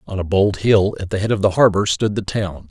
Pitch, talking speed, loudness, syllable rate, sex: 100 Hz, 290 wpm, -18 LUFS, 5.5 syllables/s, male